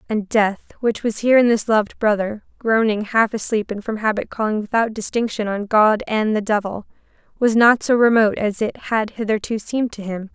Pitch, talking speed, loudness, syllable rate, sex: 215 Hz, 195 wpm, -19 LUFS, 5.4 syllables/s, female